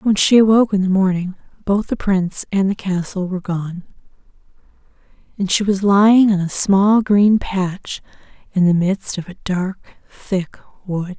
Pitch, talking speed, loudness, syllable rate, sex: 190 Hz, 165 wpm, -17 LUFS, 4.7 syllables/s, female